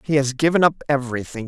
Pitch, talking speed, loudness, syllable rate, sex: 135 Hz, 205 wpm, -20 LUFS, 7.1 syllables/s, male